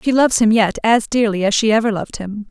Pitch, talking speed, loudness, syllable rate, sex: 220 Hz, 265 wpm, -16 LUFS, 6.4 syllables/s, female